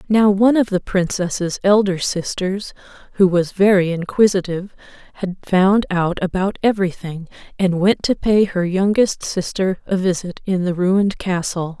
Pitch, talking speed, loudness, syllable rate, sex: 190 Hz, 145 wpm, -18 LUFS, 4.6 syllables/s, female